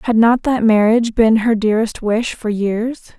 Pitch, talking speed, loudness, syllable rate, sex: 225 Hz, 190 wpm, -15 LUFS, 4.7 syllables/s, female